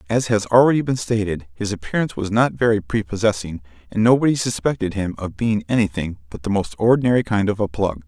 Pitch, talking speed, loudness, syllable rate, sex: 105 Hz, 195 wpm, -20 LUFS, 6.1 syllables/s, male